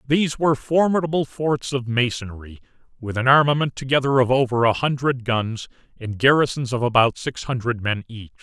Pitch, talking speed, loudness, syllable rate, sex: 130 Hz, 165 wpm, -20 LUFS, 5.3 syllables/s, male